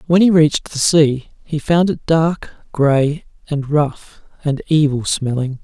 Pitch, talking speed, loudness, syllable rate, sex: 150 Hz, 160 wpm, -16 LUFS, 3.9 syllables/s, male